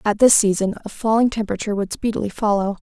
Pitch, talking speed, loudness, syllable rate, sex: 210 Hz, 190 wpm, -19 LUFS, 6.8 syllables/s, female